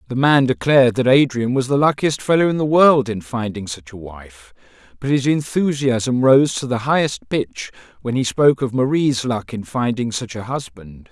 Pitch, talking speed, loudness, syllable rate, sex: 125 Hz, 195 wpm, -18 LUFS, 4.8 syllables/s, male